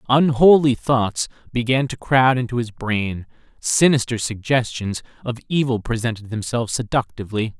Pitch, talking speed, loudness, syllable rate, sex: 120 Hz, 120 wpm, -20 LUFS, 4.9 syllables/s, male